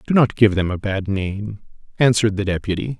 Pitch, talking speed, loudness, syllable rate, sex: 105 Hz, 200 wpm, -19 LUFS, 5.7 syllables/s, male